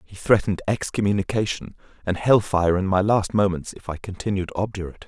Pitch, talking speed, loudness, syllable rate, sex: 100 Hz, 165 wpm, -23 LUFS, 5.9 syllables/s, male